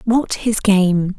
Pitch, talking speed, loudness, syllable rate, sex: 205 Hz, 150 wpm, -16 LUFS, 2.8 syllables/s, female